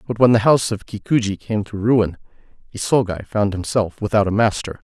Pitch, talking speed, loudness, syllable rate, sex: 105 Hz, 185 wpm, -19 LUFS, 5.6 syllables/s, male